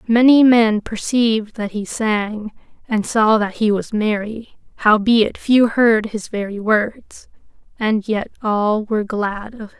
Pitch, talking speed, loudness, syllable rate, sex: 220 Hz, 155 wpm, -17 LUFS, 3.8 syllables/s, female